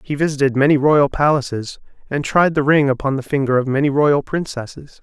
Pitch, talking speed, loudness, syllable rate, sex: 140 Hz, 190 wpm, -17 LUFS, 5.6 syllables/s, male